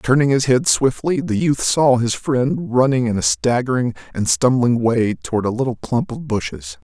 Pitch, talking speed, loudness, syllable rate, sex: 120 Hz, 190 wpm, -18 LUFS, 4.7 syllables/s, male